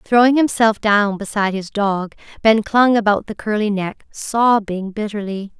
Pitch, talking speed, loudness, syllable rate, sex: 210 Hz, 150 wpm, -17 LUFS, 4.5 syllables/s, female